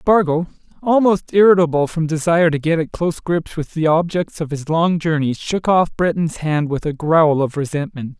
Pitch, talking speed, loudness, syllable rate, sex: 165 Hz, 190 wpm, -17 LUFS, 5.0 syllables/s, male